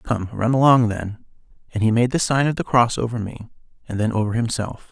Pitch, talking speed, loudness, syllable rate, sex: 115 Hz, 220 wpm, -20 LUFS, 5.5 syllables/s, male